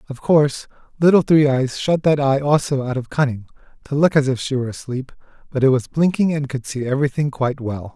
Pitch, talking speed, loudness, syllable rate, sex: 140 Hz, 220 wpm, -19 LUFS, 6.0 syllables/s, male